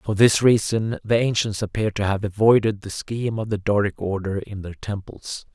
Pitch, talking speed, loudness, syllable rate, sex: 105 Hz, 195 wpm, -22 LUFS, 5.0 syllables/s, male